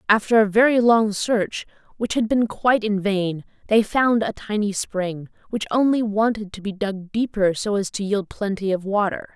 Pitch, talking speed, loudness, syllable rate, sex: 210 Hz, 190 wpm, -21 LUFS, 4.7 syllables/s, female